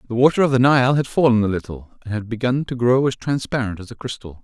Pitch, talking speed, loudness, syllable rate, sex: 120 Hz, 255 wpm, -19 LUFS, 6.3 syllables/s, male